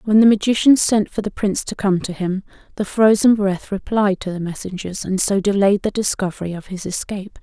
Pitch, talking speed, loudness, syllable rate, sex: 200 Hz, 210 wpm, -19 LUFS, 5.6 syllables/s, female